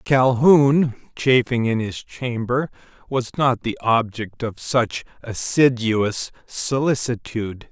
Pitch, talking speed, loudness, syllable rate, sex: 120 Hz, 100 wpm, -20 LUFS, 3.4 syllables/s, male